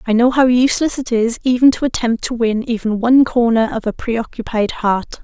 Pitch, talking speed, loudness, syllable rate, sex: 235 Hz, 205 wpm, -16 LUFS, 5.6 syllables/s, female